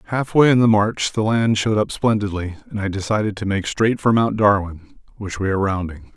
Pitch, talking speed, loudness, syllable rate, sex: 105 Hz, 225 wpm, -19 LUFS, 5.8 syllables/s, male